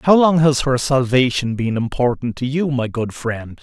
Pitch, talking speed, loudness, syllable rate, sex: 130 Hz, 200 wpm, -18 LUFS, 4.5 syllables/s, male